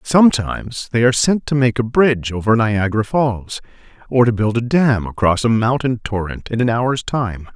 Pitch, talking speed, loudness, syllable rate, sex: 115 Hz, 190 wpm, -17 LUFS, 5.1 syllables/s, male